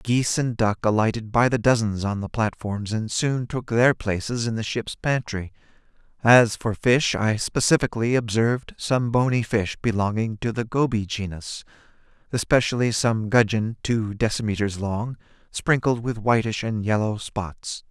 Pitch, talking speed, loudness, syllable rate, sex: 115 Hz, 150 wpm, -23 LUFS, 4.6 syllables/s, male